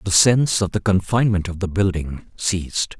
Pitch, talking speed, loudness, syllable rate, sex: 95 Hz, 180 wpm, -20 LUFS, 5.4 syllables/s, male